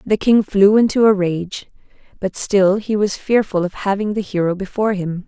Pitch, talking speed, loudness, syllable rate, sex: 200 Hz, 195 wpm, -17 LUFS, 5.0 syllables/s, female